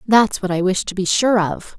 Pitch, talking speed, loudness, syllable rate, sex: 195 Hz, 270 wpm, -18 LUFS, 4.7 syllables/s, female